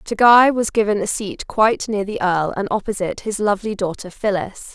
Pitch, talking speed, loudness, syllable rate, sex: 205 Hz, 200 wpm, -19 LUFS, 5.5 syllables/s, female